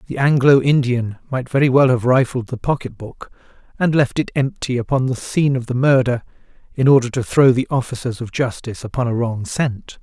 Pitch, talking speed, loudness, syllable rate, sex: 125 Hz, 200 wpm, -18 LUFS, 5.5 syllables/s, male